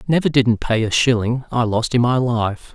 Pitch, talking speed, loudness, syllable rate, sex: 120 Hz, 220 wpm, -18 LUFS, 4.7 syllables/s, male